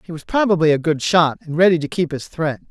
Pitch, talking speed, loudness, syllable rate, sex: 165 Hz, 265 wpm, -18 LUFS, 6.0 syllables/s, male